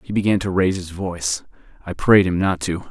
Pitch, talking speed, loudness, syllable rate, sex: 90 Hz, 205 wpm, -20 LUFS, 5.9 syllables/s, male